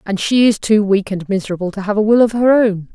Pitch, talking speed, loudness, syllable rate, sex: 210 Hz, 285 wpm, -15 LUFS, 6.0 syllables/s, female